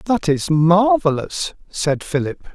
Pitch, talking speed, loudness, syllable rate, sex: 170 Hz, 120 wpm, -18 LUFS, 3.6 syllables/s, male